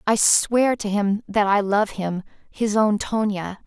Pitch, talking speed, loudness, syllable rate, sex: 210 Hz, 180 wpm, -21 LUFS, 3.7 syllables/s, female